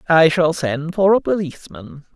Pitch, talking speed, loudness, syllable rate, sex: 160 Hz, 165 wpm, -17 LUFS, 4.7 syllables/s, male